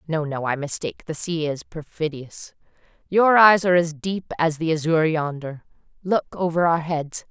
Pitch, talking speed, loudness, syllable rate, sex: 160 Hz, 150 wpm, -21 LUFS, 5.0 syllables/s, female